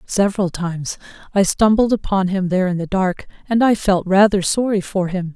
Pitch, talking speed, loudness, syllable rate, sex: 195 Hz, 190 wpm, -18 LUFS, 5.3 syllables/s, female